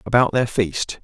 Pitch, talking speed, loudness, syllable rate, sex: 115 Hz, 175 wpm, -20 LUFS, 4.4 syllables/s, male